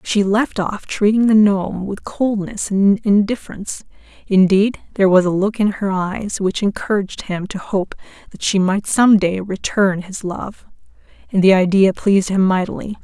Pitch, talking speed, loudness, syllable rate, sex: 200 Hz, 170 wpm, -17 LUFS, 4.8 syllables/s, female